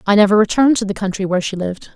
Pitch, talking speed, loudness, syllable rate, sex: 200 Hz, 275 wpm, -16 LUFS, 8.3 syllables/s, female